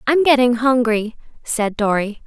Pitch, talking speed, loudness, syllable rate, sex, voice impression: 240 Hz, 135 wpm, -17 LUFS, 4.4 syllables/s, female, very feminine, young, very thin, very tensed, powerful, very bright, soft, very clear, very fluent, slightly raspy, very cute, intellectual, very refreshing, sincere, slightly calm, very friendly, very reassuring, very unique, very elegant, very sweet, very lively, kind, slightly intense, modest, very light